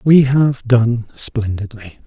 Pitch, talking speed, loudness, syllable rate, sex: 120 Hz, 115 wpm, -16 LUFS, 3.3 syllables/s, male